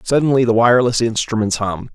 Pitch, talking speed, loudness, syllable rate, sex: 115 Hz, 155 wpm, -16 LUFS, 6.6 syllables/s, male